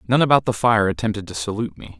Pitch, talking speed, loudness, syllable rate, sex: 105 Hz, 240 wpm, -20 LUFS, 7.2 syllables/s, male